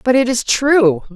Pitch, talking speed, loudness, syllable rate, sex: 240 Hz, 210 wpm, -14 LUFS, 4.1 syllables/s, female